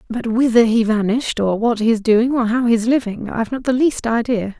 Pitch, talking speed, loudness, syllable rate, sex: 230 Hz, 260 wpm, -17 LUFS, 5.7 syllables/s, female